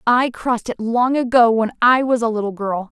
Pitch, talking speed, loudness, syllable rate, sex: 235 Hz, 220 wpm, -17 LUFS, 5.2 syllables/s, female